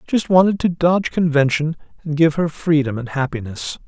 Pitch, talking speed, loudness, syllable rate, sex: 155 Hz, 170 wpm, -18 LUFS, 5.3 syllables/s, male